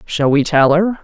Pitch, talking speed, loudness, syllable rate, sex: 165 Hz, 230 wpm, -13 LUFS, 4.7 syllables/s, female